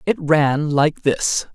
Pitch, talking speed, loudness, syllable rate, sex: 155 Hz, 155 wpm, -18 LUFS, 2.9 syllables/s, male